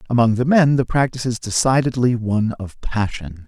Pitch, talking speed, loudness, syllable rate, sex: 120 Hz, 175 wpm, -18 LUFS, 5.6 syllables/s, male